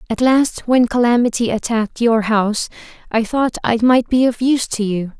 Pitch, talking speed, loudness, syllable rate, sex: 235 Hz, 185 wpm, -16 LUFS, 5.2 syllables/s, female